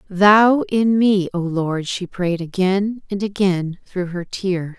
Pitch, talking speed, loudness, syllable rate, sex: 190 Hz, 165 wpm, -19 LUFS, 3.4 syllables/s, female